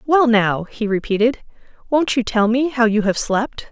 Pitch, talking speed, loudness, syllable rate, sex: 235 Hz, 195 wpm, -18 LUFS, 4.5 syllables/s, female